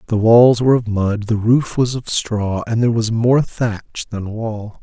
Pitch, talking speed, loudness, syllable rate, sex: 115 Hz, 210 wpm, -17 LUFS, 4.2 syllables/s, male